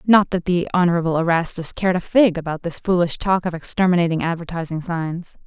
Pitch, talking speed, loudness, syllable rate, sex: 175 Hz, 175 wpm, -20 LUFS, 5.9 syllables/s, female